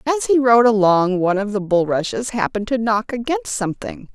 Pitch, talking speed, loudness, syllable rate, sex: 220 Hz, 190 wpm, -18 LUFS, 5.5 syllables/s, female